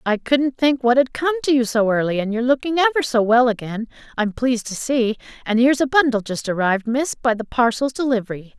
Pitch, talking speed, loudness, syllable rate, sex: 245 Hz, 225 wpm, -19 LUFS, 6.1 syllables/s, female